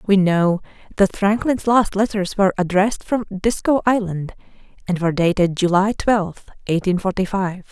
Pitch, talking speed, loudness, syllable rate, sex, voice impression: 195 Hz, 150 wpm, -19 LUFS, 4.9 syllables/s, female, feminine, adult-like, tensed, slightly powerful, slightly bright, slightly soft, slightly raspy, intellectual, calm, friendly, reassuring, elegant